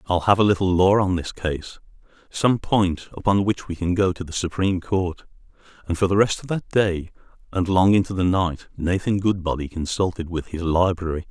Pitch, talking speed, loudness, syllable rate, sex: 90 Hz, 190 wpm, -22 LUFS, 5.3 syllables/s, male